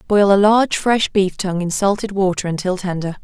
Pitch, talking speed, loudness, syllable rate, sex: 190 Hz, 205 wpm, -17 LUFS, 5.5 syllables/s, female